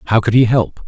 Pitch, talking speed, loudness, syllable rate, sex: 115 Hz, 275 wpm, -14 LUFS, 6.2 syllables/s, male